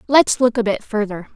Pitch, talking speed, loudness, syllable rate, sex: 225 Hz, 220 wpm, -18 LUFS, 5.1 syllables/s, female